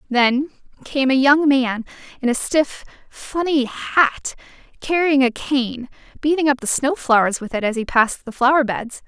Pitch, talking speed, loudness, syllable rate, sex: 265 Hz, 170 wpm, -19 LUFS, 4.5 syllables/s, female